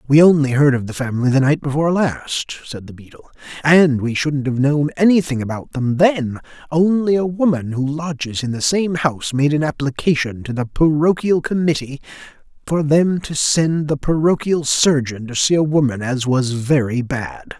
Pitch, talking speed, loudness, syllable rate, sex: 145 Hz, 180 wpm, -17 LUFS, 4.9 syllables/s, male